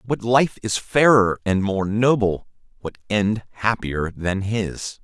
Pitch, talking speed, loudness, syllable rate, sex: 105 Hz, 145 wpm, -20 LUFS, 3.5 syllables/s, male